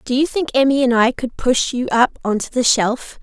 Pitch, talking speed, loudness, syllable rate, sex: 250 Hz, 260 wpm, -17 LUFS, 5.0 syllables/s, female